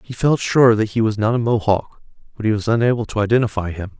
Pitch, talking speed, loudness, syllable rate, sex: 110 Hz, 240 wpm, -18 LUFS, 6.3 syllables/s, male